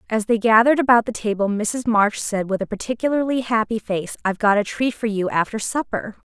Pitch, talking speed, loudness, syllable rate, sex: 220 Hz, 210 wpm, -20 LUFS, 5.8 syllables/s, female